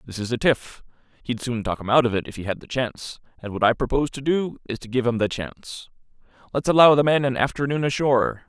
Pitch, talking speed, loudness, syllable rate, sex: 125 Hz, 250 wpm, -22 LUFS, 6.3 syllables/s, male